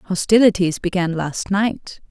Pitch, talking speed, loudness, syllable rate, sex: 185 Hz, 115 wpm, -18 LUFS, 4.0 syllables/s, female